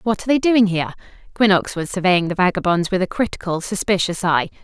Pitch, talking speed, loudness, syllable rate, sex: 190 Hz, 195 wpm, -19 LUFS, 6.2 syllables/s, female